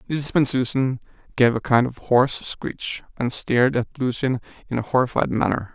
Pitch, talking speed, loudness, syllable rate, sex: 125 Hz, 165 wpm, -22 LUFS, 5.0 syllables/s, male